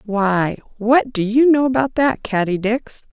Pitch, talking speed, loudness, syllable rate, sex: 230 Hz, 170 wpm, -17 LUFS, 4.1 syllables/s, female